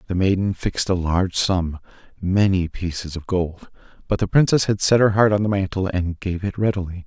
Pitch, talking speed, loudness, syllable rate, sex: 95 Hz, 205 wpm, -21 LUFS, 5.4 syllables/s, male